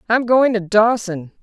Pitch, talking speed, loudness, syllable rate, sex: 215 Hz, 170 wpm, -16 LUFS, 4.2 syllables/s, female